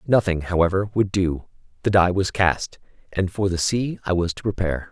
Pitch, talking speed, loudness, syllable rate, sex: 95 Hz, 195 wpm, -22 LUFS, 5.2 syllables/s, male